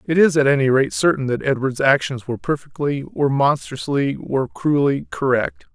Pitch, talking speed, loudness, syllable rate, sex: 140 Hz, 145 wpm, -19 LUFS, 5.3 syllables/s, male